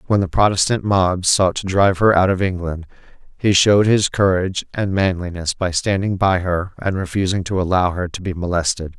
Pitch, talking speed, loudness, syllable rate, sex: 95 Hz, 195 wpm, -18 LUFS, 5.3 syllables/s, male